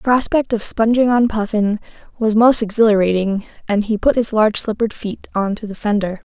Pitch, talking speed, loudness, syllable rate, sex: 215 Hz, 190 wpm, -17 LUFS, 5.7 syllables/s, female